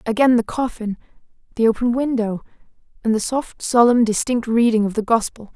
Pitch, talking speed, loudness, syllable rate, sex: 230 Hz, 160 wpm, -19 LUFS, 5.4 syllables/s, female